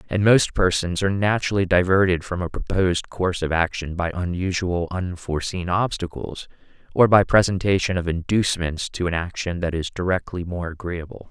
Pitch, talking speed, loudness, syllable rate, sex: 90 Hz, 155 wpm, -22 LUFS, 5.5 syllables/s, male